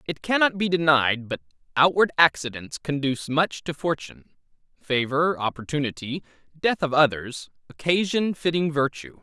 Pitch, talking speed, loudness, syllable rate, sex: 150 Hz, 125 wpm, -23 LUFS, 5.0 syllables/s, male